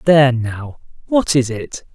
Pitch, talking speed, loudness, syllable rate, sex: 135 Hz, 155 wpm, -17 LUFS, 4.1 syllables/s, male